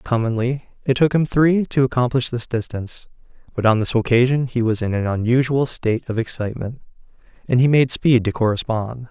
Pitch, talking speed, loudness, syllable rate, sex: 120 Hz, 180 wpm, -19 LUFS, 5.6 syllables/s, male